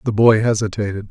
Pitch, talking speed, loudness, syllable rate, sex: 105 Hz, 165 wpm, -17 LUFS, 6.1 syllables/s, male